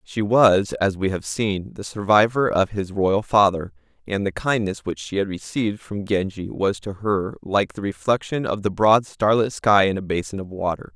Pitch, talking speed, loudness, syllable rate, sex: 100 Hz, 205 wpm, -21 LUFS, 4.7 syllables/s, male